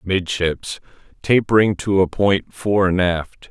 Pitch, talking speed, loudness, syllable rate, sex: 95 Hz, 135 wpm, -18 LUFS, 4.0 syllables/s, male